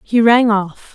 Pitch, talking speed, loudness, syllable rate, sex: 220 Hz, 190 wpm, -13 LUFS, 3.5 syllables/s, female